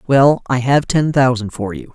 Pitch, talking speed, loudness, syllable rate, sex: 135 Hz, 215 wpm, -15 LUFS, 4.6 syllables/s, female